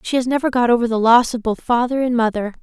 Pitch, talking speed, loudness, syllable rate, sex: 240 Hz, 275 wpm, -17 LUFS, 6.5 syllables/s, female